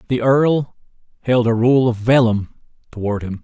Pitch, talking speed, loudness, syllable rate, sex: 120 Hz, 155 wpm, -17 LUFS, 4.5 syllables/s, male